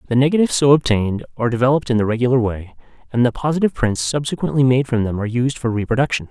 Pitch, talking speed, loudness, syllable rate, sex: 125 Hz, 210 wpm, -18 LUFS, 7.6 syllables/s, male